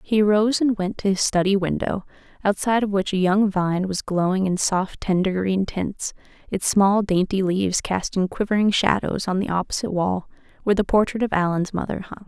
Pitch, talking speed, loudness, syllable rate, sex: 195 Hz, 190 wpm, -22 LUFS, 5.3 syllables/s, female